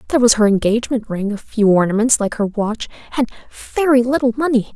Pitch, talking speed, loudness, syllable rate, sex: 230 Hz, 190 wpm, -17 LUFS, 6.3 syllables/s, female